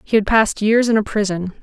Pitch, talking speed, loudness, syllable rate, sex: 210 Hz, 260 wpm, -17 LUFS, 6.0 syllables/s, female